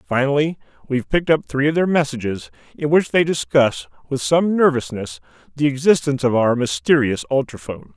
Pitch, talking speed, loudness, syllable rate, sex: 130 Hz, 160 wpm, -19 LUFS, 5.8 syllables/s, male